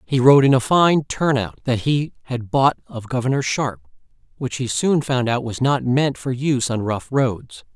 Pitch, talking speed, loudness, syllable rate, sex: 130 Hz, 225 wpm, -19 LUFS, 4.6 syllables/s, male